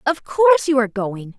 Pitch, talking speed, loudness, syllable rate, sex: 260 Hz, 215 wpm, -18 LUFS, 5.5 syllables/s, female